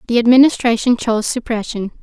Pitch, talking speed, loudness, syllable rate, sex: 235 Hz, 120 wpm, -15 LUFS, 6.2 syllables/s, female